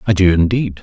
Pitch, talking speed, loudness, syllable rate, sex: 95 Hz, 220 wpm, -14 LUFS, 5.8 syllables/s, male